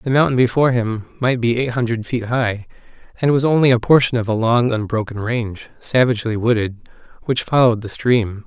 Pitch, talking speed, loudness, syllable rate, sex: 120 Hz, 185 wpm, -18 LUFS, 5.7 syllables/s, male